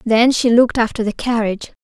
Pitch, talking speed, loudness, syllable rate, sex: 230 Hz, 195 wpm, -16 LUFS, 6.1 syllables/s, female